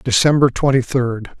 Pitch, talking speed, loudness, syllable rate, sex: 130 Hz, 130 wpm, -16 LUFS, 4.7 syllables/s, male